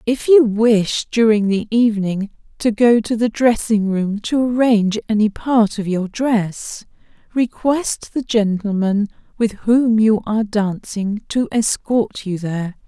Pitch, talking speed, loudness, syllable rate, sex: 220 Hz, 145 wpm, -17 LUFS, 3.9 syllables/s, female